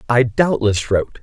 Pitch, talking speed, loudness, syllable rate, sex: 120 Hz, 145 wpm, -17 LUFS, 4.8 syllables/s, male